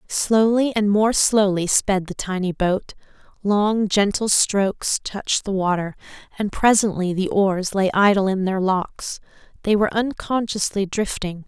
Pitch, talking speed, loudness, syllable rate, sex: 200 Hz, 135 wpm, -20 LUFS, 4.3 syllables/s, female